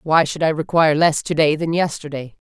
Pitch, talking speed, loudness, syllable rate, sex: 155 Hz, 220 wpm, -18 LUFS, 5.7 syllables/s, female